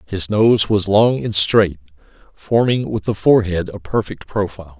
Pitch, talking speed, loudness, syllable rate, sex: 100 Hz, 165 wpm, -17 LUFS, 4.7 syllables/s, male